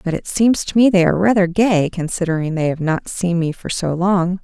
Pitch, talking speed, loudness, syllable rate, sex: 180 Hz, 245 wpm, -17 LUFS, 5.3 syllables/s, female